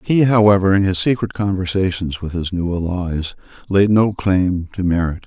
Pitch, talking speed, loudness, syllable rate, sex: 95 Hz, 170 wpm, -17 LUFS, 4.8 syllables/s, male